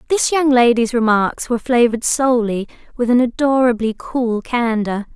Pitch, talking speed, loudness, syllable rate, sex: 240 Hz, 140 wpm, -16 LUFS, 5.0 syllables/s, female